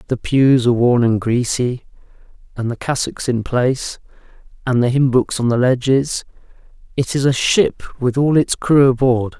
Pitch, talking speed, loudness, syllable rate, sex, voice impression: 125 Hz, 170 wpm, -16 LUFS, 4.8 syllables/s, male, very masculine, middle-aged, thick, tensed, slightly weak, slightly dark, slightly soft, clear, slightly fluent, slightly cool, intellectual, slightly refreshing, slightly sincere, calm, mature, slightly friendly, reassuring, slightly unique, slightly elegant, wild, slightly sweet, lively, kind, slightly intense